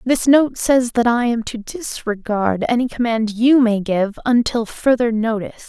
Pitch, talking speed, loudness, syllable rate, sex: 235 Hz, 170 wpm, -17 LUFS, 4.4 syllables/s, female